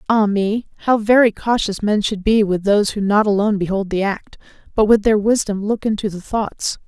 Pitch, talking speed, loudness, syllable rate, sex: 210 Hz, 210 wpm, -17 LUFS, 5.3 syllables/s, female